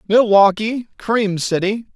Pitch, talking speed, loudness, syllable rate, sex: 210 Hz, 90 wpm, -17 LUFS, 3.7 syllables/s, male